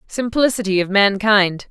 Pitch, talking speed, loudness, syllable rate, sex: 210 Hz, 105 wpm, -16 LUFS, 4.5 syllables/s, female